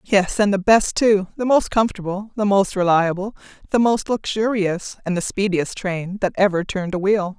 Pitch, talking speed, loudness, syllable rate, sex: 195 Hz, 180 wpm, -19 LUFS, 5.0 syllables/s, female